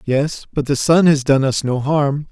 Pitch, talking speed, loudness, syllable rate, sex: 140 Hz, 235 wpm, -16 LUFS, 4.3 syllables/s, male